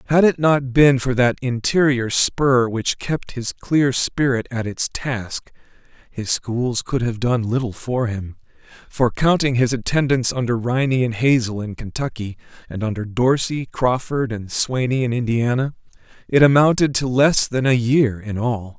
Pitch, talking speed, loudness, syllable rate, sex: 125 Hz, 165 wpm, -19 LUFS, 4.4 syllables/s, male